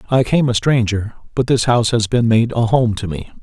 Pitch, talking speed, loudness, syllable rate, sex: 115 Hz, 245 wpm, -16 LUFS, 5.4 syllables/s, male